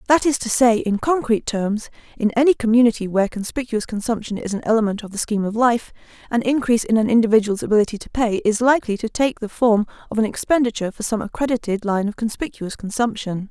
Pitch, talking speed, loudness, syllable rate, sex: 225 Hz, 200 wpm, -20 LUFS, 6.5 syllables/s, female